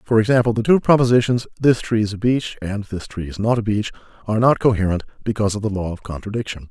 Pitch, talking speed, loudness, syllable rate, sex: 110 Hz, 235 wpm, -19 LUFS, 6.7 syllables/s, male